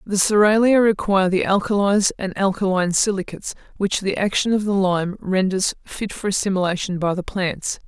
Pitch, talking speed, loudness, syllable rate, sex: 195 Hz, 160 wpm, -20 LUFS, 5.3 syllables/s, female